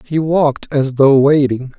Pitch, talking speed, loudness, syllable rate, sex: 140 Hz, 170 wpm, -13 LUFS, 4.4 syllables/s, male